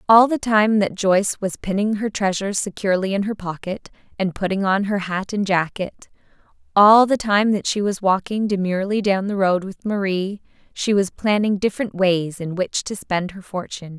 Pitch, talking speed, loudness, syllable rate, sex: 195 Hz, 190 wpm, -20 LUFS, 5.1 syllables/s, female